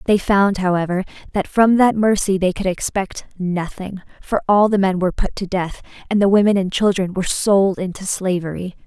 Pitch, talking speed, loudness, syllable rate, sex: 190 Hz, 190 wpm, -18 LUFS, 5.2 syllables/s, female